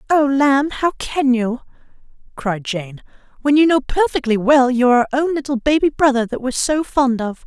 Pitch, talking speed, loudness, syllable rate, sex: 265 Hz, 185 wpm, -17 LUFS, 5.0 syllables/s, female